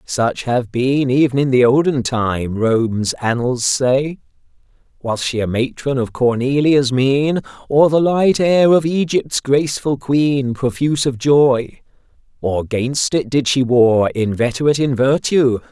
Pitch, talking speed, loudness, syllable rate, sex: 130 Hz, 145 wpm, -16 LUFS, 4.0 syllables/s, male